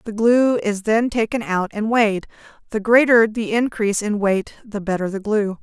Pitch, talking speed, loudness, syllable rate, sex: 215 Hz, 190 wpm, -19 LUFS, 4.9 syllables/s, female